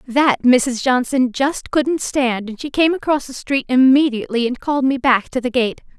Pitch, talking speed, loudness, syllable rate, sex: 260 Hz, 200 wpm, -17 LUFS, 4.8 syllables/s, female